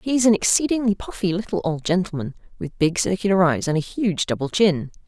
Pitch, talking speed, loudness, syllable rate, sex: 185 Hz, 200 wpm, -21 LUFS, 5.9 syllables/s, female